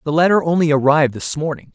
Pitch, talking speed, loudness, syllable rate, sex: 150 Hz, 205 wpm, -16 LUFS, 6.8 syllables/s, male